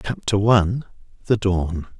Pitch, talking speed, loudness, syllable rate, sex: 100 Hz, 90 wpm, -20 LUFS, 4.4 syllables/s, male